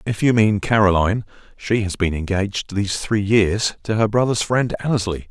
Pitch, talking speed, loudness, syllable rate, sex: 105 Hz, 180 wpm, -19 LUFS, 5.2 syllables/s, male